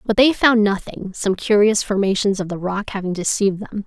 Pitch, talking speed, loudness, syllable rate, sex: 205 Hz, 200 wpm, -18 LUFS, 5.4 syllables/s, female